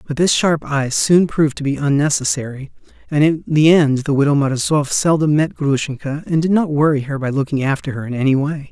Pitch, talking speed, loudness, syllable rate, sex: 145 Hz, 215 wpm, -17 LUFS, 5.7 syllables/s, male